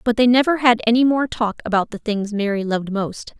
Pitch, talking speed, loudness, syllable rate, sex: 225 Hz, 230 wpm, -19 LUFS, 5.7 syllables/s, female